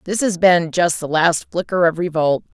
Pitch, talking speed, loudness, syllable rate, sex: 170 Hz, 210 wpm, -17 LUFS, 4.8 syllables/s, female